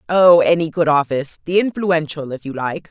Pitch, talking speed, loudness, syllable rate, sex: 160 Hz, 165 wpm, -17 LUFS, 5.4 syllables/s, female